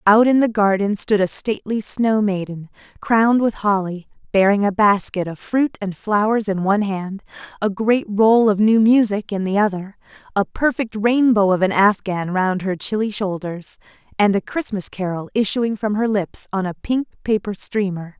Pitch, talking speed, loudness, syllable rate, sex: 205 Hz, 175 wpm, -19 LUFS, 4.6 syllables/s, female